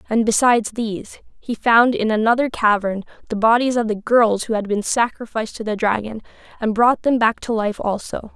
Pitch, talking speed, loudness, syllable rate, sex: 225 Hz, 195 wpm, -19 LUFS, 5.3 syllables/s, female